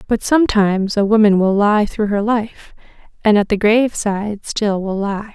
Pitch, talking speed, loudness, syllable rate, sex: 210 Hz, 180 wpm, -16 LUFS, 4.9 syllables/s, female